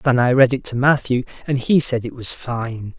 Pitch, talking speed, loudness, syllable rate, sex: 125 Hz, 240 wpm, -19 LUFS, 4.9 syllables/s, male